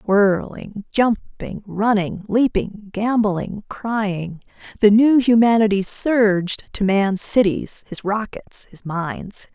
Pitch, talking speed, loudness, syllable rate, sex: 205 Hz, 100 wpm, -19 LUFS, 3.4 syllables/s, female